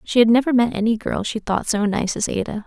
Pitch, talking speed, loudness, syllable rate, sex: 220 Hz, 270 wpm, -20 LUFS, 5.8 syllables/s, female